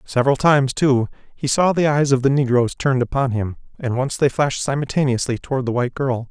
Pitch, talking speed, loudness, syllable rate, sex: 130 Hz, 210 wpm, -19 LUFS, 6.2 syllables/s, male